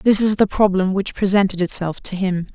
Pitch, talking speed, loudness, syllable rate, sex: 195 Hz, 210 wpm, -18 LUFS, 5.2 syllables/s, female